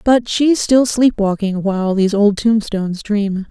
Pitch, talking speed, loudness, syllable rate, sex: 210 Hz, 170 wpm, -15 LUFS, 4.5 syllables/s, female